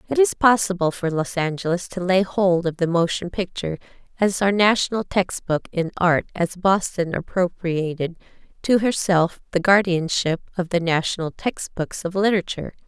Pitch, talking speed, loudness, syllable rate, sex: 180 Hz, 160 wpm, -21 LUFS, 5.0 syllables/s, female